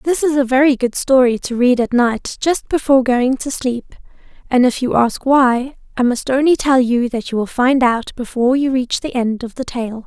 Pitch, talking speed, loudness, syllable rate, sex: 255 Hz, 225 wpm, -16 LUFS, 4.9 syllables/s, female